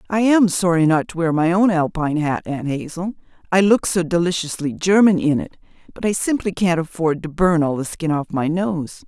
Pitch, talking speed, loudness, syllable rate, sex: 170 Hz, 210 wpm, -19 LUFS, 5.2 syllables/s, female